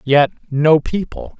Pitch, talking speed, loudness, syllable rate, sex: 150 Hz, 130 wpm, -16 LUFS, 3.8 syllables/s, male